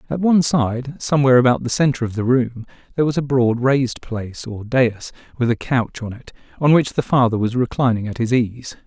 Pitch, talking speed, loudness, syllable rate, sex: 125 Hz, 215 wpm, -18 LUFS, 5.7 syllables/s, male